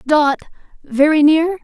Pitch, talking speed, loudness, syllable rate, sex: 305 Hz, 110 wpm, -14 LUFS, 4.0 syllables/s, female